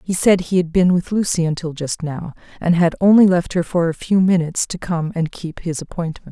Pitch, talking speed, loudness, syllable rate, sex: 175 Hz, 240 wpm, -18 LUFS, 5.4 syllables/s, female